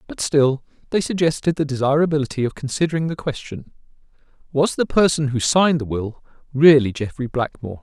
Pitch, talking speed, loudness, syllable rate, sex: 140 Hz, 155 wpm, -19 LUFS, 5.9 syllables/s, male